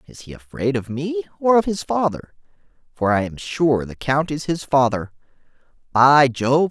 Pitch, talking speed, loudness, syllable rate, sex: 140 Hz, 180 wpm, -19 LUFS, 4.5 syllables/s, male